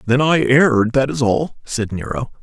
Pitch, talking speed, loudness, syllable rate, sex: 125 Hz, 200 wpm, -17 LUFS, 4.7 syllables/s, male